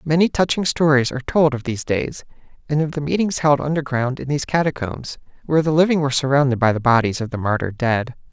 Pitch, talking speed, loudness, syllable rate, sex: 140 Hz, 210 wpm, -19 LUFS, 6.5 syllables/s, male